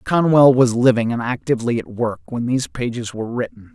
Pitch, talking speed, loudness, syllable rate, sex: 120 Hz, 190 wpm, -18 LUFS, 5.9 syllables/s, male